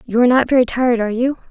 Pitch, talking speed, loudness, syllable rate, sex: 245 Hz, 280 wpm, -15 LUFS, 8.6 syllables/s, female